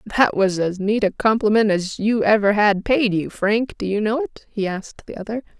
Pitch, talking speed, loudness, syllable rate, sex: 210 Hz, 225 wpm, -19 LUFS, 5.1 syllables/s, female